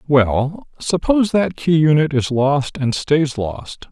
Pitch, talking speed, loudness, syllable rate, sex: 150 Hz, 155 wpm, -17 LUFS, 3.6 syllables/s, male